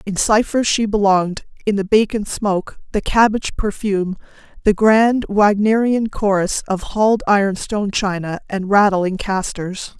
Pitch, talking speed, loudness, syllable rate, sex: 205 Hz, 125 wpm, -17 LUFS, 4.7 syllables/s, female